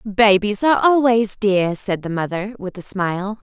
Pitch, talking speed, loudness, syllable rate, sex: 205 Hz, 170 wpm, -18 LUFS, 4.6 syllables/s, female